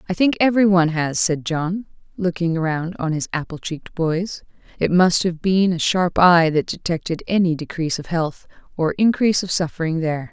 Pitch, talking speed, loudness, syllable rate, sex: 170 Hz, 185 wpm, -20 LUFS, 5.3 syllables/s, female